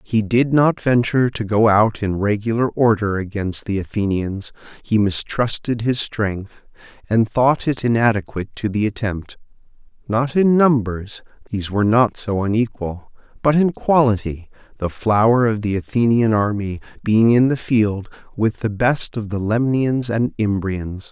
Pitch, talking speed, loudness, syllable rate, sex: 110 Hz, 145 wpm, -19 LUFS, 4.5 syllables/s, male